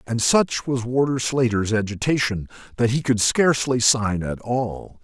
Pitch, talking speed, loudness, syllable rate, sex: 120 Hz, 155 wpm, -21 LUFS, 4.4 syllables/s, male